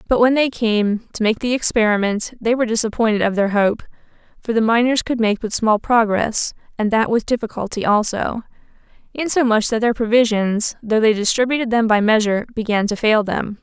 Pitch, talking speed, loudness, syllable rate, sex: 225 Hz, 180 wpm, -18 LUFS, 5.4 syllables/s, female